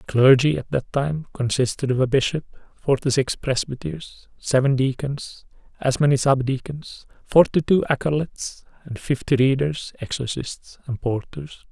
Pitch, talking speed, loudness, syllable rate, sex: 135 Hz, 140 wpm, -22 LUFS, 4.6 syllables/s, male